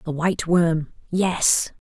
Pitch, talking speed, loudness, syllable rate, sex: 170 Hz, 95 wpm, -21 LUFS, 3.3 syllables/s, female